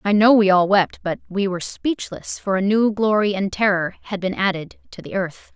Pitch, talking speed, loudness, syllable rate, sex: 195 Hz, 225 wpm, -20 LUFS, 5.2 syllables/s, female